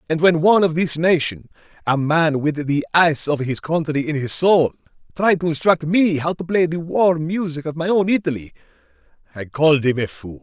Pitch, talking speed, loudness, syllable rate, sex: 155 Hz, 195 wpm, -18 LUFS, 5.2 syllables/s, male